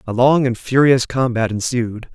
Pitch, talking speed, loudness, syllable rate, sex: 125 Hz, 170 wpm, -17 LUFS, 4.5 syllables/s, male